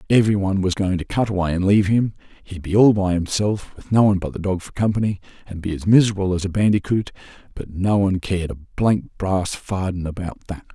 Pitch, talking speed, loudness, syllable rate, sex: 95 Hz, 225 wpm, -20 LUFS, 6.2 syllables/s, male